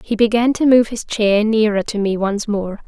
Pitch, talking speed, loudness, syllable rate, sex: 215 Hz, 230 wpm, -16 LUFS, 4.8 syllables/s, female